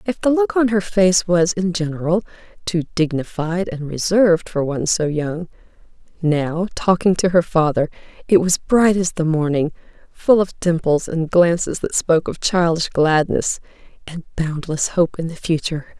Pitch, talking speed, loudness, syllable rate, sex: 170 Hz, 160 wpm, -18 LUFS, 4.8 syllables/s, female